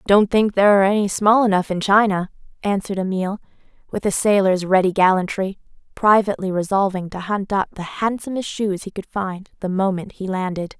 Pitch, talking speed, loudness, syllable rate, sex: 195 Hz, 170 wpm, -19 LUFS, 5.6 syllables/s, female